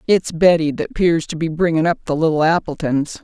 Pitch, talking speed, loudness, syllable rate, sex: 165 Hz, 205 wpm, -17 LUFS, 5.4 syllables/s, female